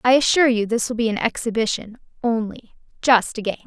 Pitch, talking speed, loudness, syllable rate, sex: 230 Hz, 195 wpm, -20 LUFS, 6.0 syllables/s, female